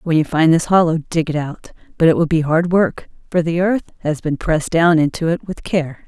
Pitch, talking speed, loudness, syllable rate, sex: 165 Hz, 245 wpm, -17 LUFS, 5.3 syllables/s, female